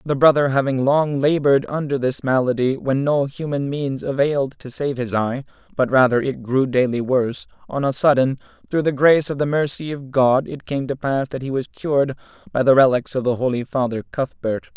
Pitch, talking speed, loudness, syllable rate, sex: 135 Hz, 205 wpm, -20 LUFS, 5.3 syllables/s, male